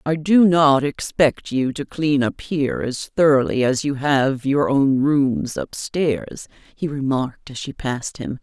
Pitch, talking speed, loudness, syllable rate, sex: 140 Hz, 180 wpm, -19 LUFS, 4.0 syllables/s, female